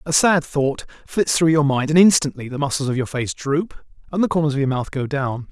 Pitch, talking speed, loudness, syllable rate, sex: 145 Hz, 250 wpm, -19 LUFS, 5.5 syllables/s, male